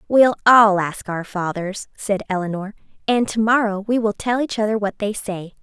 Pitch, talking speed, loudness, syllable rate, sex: 210 Hz, 190 wpm, -19 LUFS, 4.9 syllables/s, female